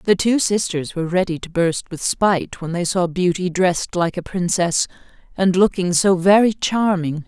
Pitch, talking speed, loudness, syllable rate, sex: 180 Hz, 180 wpm, -19 LUFS, 4.8 syllables/s, female